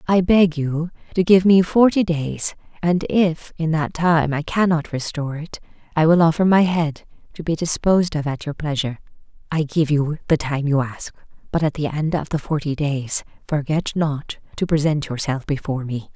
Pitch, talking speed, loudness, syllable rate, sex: 155 Hz, 190 wpm, -20 LUFS, 4.9 syllables/s, female